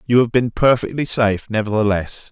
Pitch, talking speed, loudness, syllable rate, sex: 115 Hz, 155 wpm, -18 LUFS, 5.6 syllables/s, male